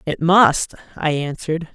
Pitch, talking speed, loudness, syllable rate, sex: 160 Hz, 135 wpm, -18 LUFS, 4.4 syllables/s, female